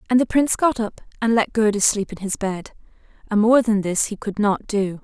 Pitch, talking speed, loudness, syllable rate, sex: 215 Hz, 240 wpm, -20 LUFS, 5.3 syllables/s, female